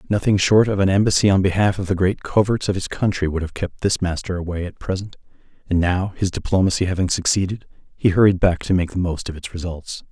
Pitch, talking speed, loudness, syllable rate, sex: 95 Hz, 225 wpm, -20 LUFS, 6.1 syllables/s, male